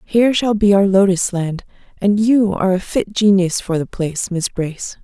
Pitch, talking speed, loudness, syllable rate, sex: 195 Hz, 200 wpm, -16 LUFS, 5.0 syllables/s, female